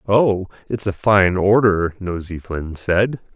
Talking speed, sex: 145 wpm, male